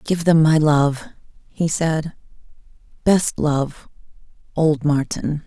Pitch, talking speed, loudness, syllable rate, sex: 155 Hz, 100 wpm, -19 LUFS, 3.2 syllables/s, female